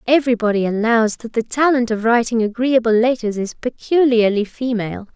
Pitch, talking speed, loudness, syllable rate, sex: 235 Hz, 140 wpm, -17 LUFS, 5.4 syllables/s, female